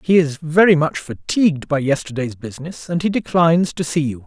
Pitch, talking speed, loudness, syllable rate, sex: 155 Hz, 195 wpm, -18 LUFS, 5.5 syllables/s, male